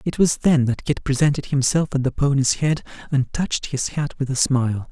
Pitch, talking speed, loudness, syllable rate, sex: 140 Hz, 220 wpm, -21 LUFS, 5.4 syllables/s, male